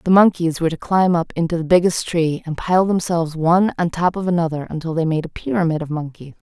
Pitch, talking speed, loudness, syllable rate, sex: 165 Hz, 230 wpm, -19 LUFS, 6.1 syllables/s, female